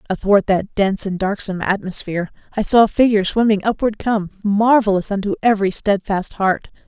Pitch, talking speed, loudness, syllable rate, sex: 200 Hz, 155 wpm, -18 LUFS, 5.7 syllables/s, female